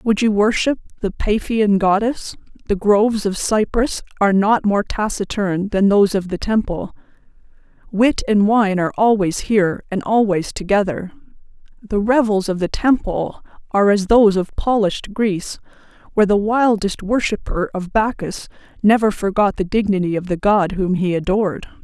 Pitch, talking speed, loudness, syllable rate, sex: 205 Hz, 150 wpm, -18 LUFS, 5.0 syllables/s, female